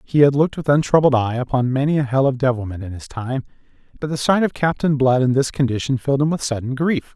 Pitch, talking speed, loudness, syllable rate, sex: 135 Hz, 245 wpm, -19 LUFS, 6.3 syllables/s, male